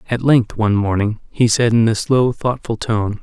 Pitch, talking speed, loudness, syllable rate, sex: 110 Hz, 205 wpm, -17 LUFS, 5.1 syllables/s, male